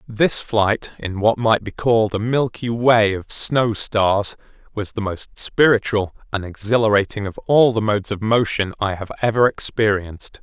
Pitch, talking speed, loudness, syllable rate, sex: 110 Hz, 165 wpm, -19 LUFS, 4.5 syllables/s, male